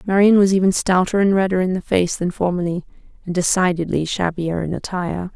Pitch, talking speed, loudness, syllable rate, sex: 180 Hz, 180 wpm, -19 LUFS, 5.8 syllables/s, female